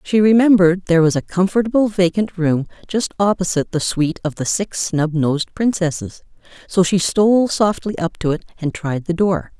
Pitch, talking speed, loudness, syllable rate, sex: 180 Hz, 175 wpm, -17 LUFS, 5.4 syllables/s, female